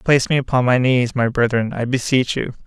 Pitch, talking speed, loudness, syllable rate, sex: 125 Hz, 225 wpm, -18 LUFS, 5.7 syllables/s, male